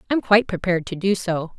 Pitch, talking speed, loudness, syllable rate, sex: 185 Hz, 225 wpm, -21 LUFS, 6.5 syllables/s, female